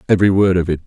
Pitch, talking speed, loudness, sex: 90 Hz, 275 wpm, -15 LUFS, male